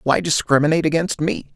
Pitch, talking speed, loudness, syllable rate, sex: 155 Hz, 155 wpm, -18 LUFS, 6.3 syllables/s, male